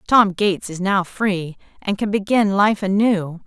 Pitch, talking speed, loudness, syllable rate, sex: 195 Hz, 175 wpm, -19 LUFS, 4.3 syllables/s, female